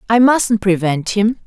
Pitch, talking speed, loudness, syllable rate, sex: 210 Hz, 165 wpm, -15 LUFS, 4.0 syllables/s, female